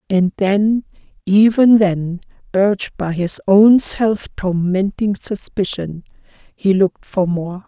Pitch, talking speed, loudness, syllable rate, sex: 195 Hz, 100 wpm, -16 LUFS, 3.6 syllables/s, female